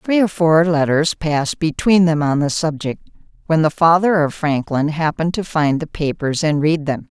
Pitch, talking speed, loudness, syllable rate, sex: 160 Hz, 190 wpm, -17 LUFS, 4.8 syllables/s, female